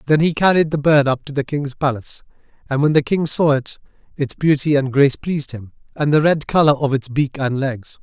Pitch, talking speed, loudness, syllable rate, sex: 140 Hz, 230 wpm, -18 LUFS, 5.6 syllables/s, male